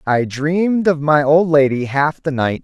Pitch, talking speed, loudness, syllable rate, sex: 150 Hz, 205 wpm, -16 LUFS, 4.4 syllables/s, male